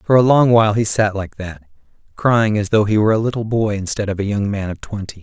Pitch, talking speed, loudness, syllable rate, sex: 105 Hz, 265 wpm, -17 LUFS, 6.1 syllables/s, male